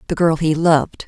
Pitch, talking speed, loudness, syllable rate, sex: 160 Hz, 225 wpm, -16 LUFS, 5.8 syllables/s, female